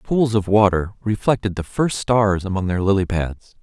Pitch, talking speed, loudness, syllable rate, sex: 100 Hz, 165 wpm, -19 LUFS, 4.9 syllables/s, male